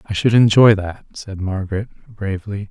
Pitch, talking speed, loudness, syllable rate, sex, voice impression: 100 Hz, 155 wpm, -17 LUFS, 5.2 syllables/s, male, very masculine, adult-like, dark, cool, slightly sincere, very calm, slightly kind